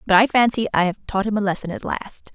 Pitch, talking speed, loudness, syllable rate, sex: 205 Hz, 280 wpm, -20 LUFS, 6.2 syllables/s, female